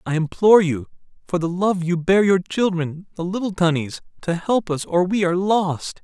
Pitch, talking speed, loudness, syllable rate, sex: 180 Hz, 200 wpm, -20 LUFS, 5.1 syllables/s, male